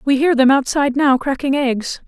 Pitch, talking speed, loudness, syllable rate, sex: 270 Hz, 200 wpm, -16 LUFS, 5.2 syllables/s, female